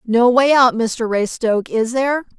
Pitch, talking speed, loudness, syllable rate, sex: 240 Hz, 175 wpm, -16 LUFS, 4.6 syllables/s, female